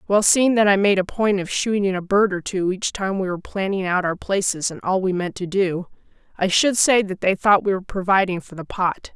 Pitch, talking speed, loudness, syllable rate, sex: 190 Hz, 255 wpm, -20 LUFS, 5.4 syllables/s, female